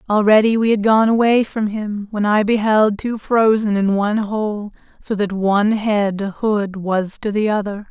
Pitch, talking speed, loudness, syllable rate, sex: 210 Hz, 190 wpm, -17 LUFS, 4.5 syllables/s, female